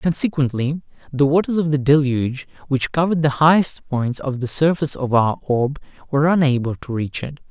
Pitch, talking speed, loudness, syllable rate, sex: 140 Hz, 175 wpm, -19 LUFS, 5.6 syllables/s, male